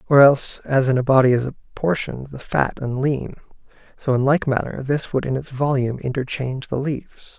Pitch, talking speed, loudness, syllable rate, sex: 135 Hz, 195 wpm, -20 LUFS, 5.4 syllables/s, male